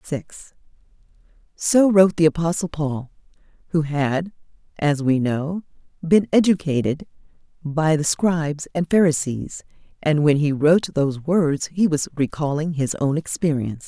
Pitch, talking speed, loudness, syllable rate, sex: 155 Hz, 130 wpm, -20 LUFS, 4.6 syllables/s, female